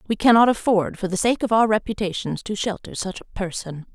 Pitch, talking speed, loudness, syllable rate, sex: 205 Hz, 215 wpm, -21 LUFS, 5.7 syllables/s, female